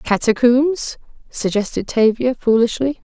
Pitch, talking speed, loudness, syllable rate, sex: 240 Hz, 75 wpm, -17 LUFS, 4.1 syllables/s, female